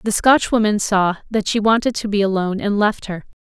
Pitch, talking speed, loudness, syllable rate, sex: 205 Hz, 210 wpm, -17 LUFS, 5.6 syllables/s, female